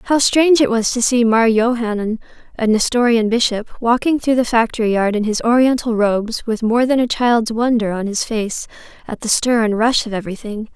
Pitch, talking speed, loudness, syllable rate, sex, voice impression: 230 Hz, 200 wpm, -16 LUFS, 5.3 syllables/s, female, feminine, slightly young, tensed, slightly powerful, slightly bright, clear, fluent, slightly cute, friendly, kind